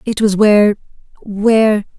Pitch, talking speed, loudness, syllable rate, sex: 210 Hz, 90 wpm, -13 LUFS, 4.7 syllables/s, female